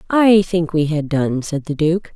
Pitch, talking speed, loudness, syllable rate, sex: 165 Hz, 225 wpm, -17 LUFS, 4.2 syllables/s, female